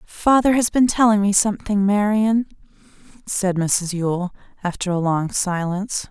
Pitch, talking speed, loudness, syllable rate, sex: 200 Hz, 140 wpm, -19 LUFS, 4.4 syllables/s, female